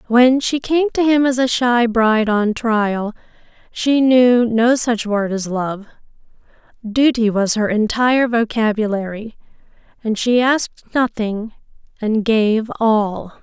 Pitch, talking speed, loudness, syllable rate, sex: 230 Hz, 135 wpm, -17 LUFS, 3.9 syllables/s, female